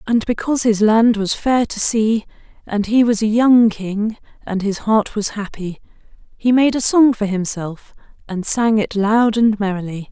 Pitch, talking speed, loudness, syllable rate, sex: 215 Hz, 185 wpm, -17 LUFS, 4.4 syllables/s, female